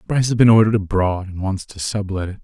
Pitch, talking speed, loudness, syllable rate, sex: 100 Hz, 245 wpm, -18 LUFS, 6.6 syllables/s, male